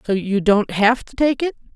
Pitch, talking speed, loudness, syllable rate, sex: 225 Hz, 240 wpm, -18 LUFS, 5.0 syllables/s, female